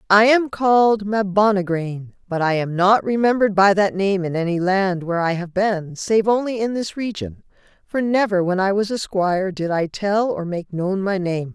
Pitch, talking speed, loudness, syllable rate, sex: 195 Hz, 205 wpm, -19 LUFS, 4.8 syllables/s, female